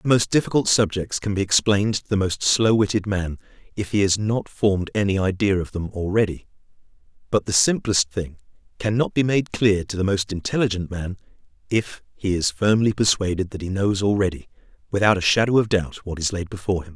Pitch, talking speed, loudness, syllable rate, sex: 100 Hz, 195 wpm, -21 LUFS, 5.6 syllables/s, male